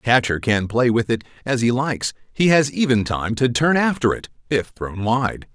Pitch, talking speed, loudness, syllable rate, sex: 120 Hz, 215 wpm, -20 LUFS, 5.0 syllables/s, male